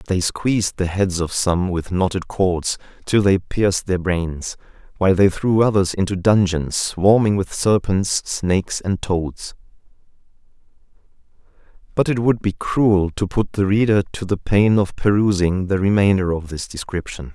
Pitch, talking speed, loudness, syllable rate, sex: 95 Hz, 155 wpm, -19 LUFS, 4.4 syllables/s, male